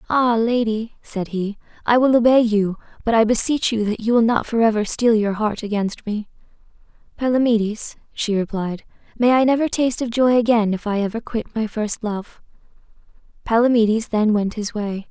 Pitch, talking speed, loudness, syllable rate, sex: 225 Hz, 180 wpm, -19 LUFS, 5.1 syllables/s, female